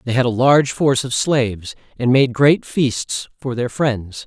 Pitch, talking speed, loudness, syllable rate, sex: 125 Hz, 195 wpm, -17 LUFS, 4.5 syllables/s, male